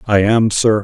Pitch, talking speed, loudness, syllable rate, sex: 105 Hz, 215 wpm, -14 LUFS, 4.5 syllables/s, male